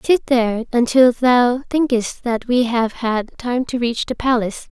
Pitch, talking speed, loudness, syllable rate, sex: 240 Hz, 175 wpm, -18 LUFS, 4.2 syllables/s, female